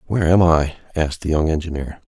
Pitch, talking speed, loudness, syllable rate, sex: 80 Hz, 200 wpm, -19 LUFS, 6.6 syllables/s, male